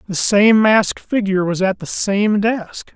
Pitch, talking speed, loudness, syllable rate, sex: 205 Hz, 185 wpm, -16 LUFS, 4.3 syllables/s, male